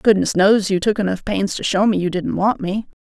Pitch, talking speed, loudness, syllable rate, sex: 200 Hz, 255 wpm, -18 LUFS, 5.3 syllables/s, female